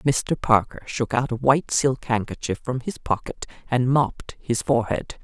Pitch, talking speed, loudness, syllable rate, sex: 125 Hz, 170 wpm, -23 LUFS, 4.8 syllables/s, female